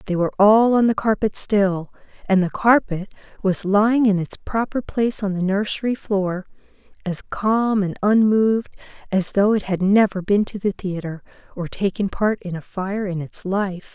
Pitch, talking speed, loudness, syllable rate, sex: 200 Hz, 180 wpm, -20 LUFS, 4.7 syllables/s, female